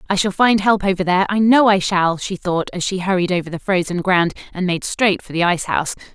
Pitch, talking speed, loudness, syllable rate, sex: 185 Hz, 255 wpm, -18 LUFS, 6.0 syllables/s, female